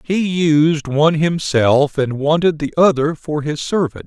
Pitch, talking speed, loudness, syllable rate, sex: 155 Hz, 160 wpm, -16 LUFS, 4.1 syllables/s, male